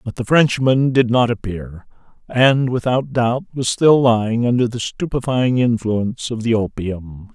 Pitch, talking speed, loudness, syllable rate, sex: 120 Hz, 155 wpm, -17 LUFS, 4.3 syllables/s, male